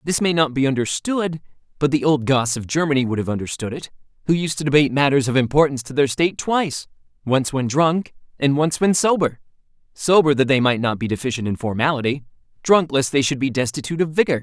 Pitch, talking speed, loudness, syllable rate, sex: 140 Hz, 205 wpm, -19 LUFS, 6.2 syllables/s, male